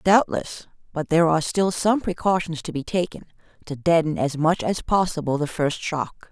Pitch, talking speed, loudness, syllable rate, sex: 165 Hz, 180 wpm, -22 LUFS, 5.0 syllables/s, female